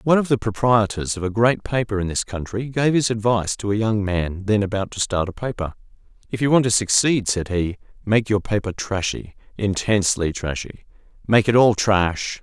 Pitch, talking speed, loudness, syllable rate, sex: 105 Hz, 195 wpm, -21 LUFS, 5.4 syllables/s, male